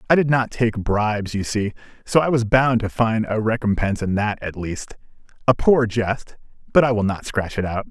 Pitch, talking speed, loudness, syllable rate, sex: 110 Hz, 220 wpm, -20 LUFS, 5.1 syllables/s, male